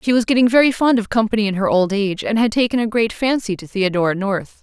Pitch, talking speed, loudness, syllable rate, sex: 215 Hz, 260 wpm, -17 LUFS, 6.4 syllables/s, female